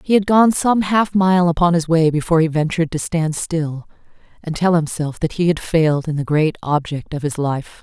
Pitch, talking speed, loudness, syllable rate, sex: 165 Hz, 220 wpm, -17 LUFS, 5.2 syllables/s, female